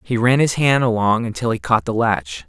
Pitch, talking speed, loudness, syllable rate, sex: 115 Hz, 240 wpm, -18 LUFS, 5.1 syllables/s, male